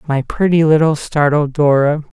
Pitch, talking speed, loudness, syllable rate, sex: 150 Hz, 135 wpm, -14 LUFS, 4.7 syllables/s, male